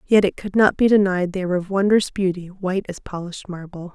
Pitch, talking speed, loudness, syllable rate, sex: 185 Hz, 230 wpm, -20 LUFS, 6.0 syllables/s, female